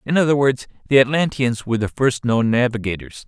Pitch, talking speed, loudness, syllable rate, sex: 125 Hz, 185 wpm, -18 LUFS, 5.7 syllables/s, male